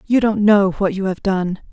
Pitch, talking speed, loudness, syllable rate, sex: 200 Hz, 245 wpm, -17 LUFS, 4.6 syllables/s, female